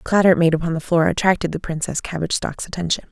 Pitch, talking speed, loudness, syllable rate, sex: 165 Hz, 250 wpm, -20 LUFS, 7.4 syllables/s, female